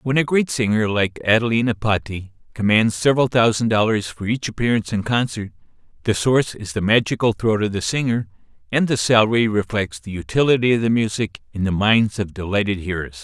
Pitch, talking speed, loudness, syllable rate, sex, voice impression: 110 Hz, 180 wpm, -19 LUFS, 5.7 syllables/s, male, masculine, very adult-like, cool, sincere, reassuring, slightly elegant